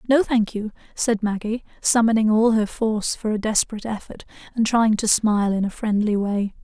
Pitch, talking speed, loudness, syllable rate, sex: 220 Hz, 190 wpm, -21 LUFS, 5.4 syllables/s, female